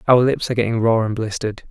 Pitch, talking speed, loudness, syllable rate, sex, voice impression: 115 Hz, 245 wpm, -19 LUFS, 7.1 syllables/s, male, masculine, adult-like, slightly relaxed, slightly weak, clear, calm, slightly friendly, reassuring, wild, kind, modest